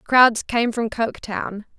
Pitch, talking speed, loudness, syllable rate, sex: 225 Hz, 135 wpm, -21 LUFS, 3.8 syllables/s, female